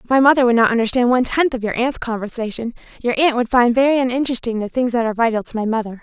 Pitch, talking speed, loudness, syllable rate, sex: 240 Hz, 250 wpm, -18 LUFS, 7.2 syllables/s, female